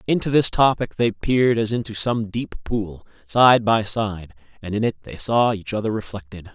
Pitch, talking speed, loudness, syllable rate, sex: 110 Hz, 195 wpm, -21 LUFS, 4.9 syllables/s, male